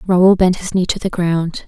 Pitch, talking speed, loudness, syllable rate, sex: 180 Hz, 250 wpm, -15 LUFS, 4.6 syllables/s, female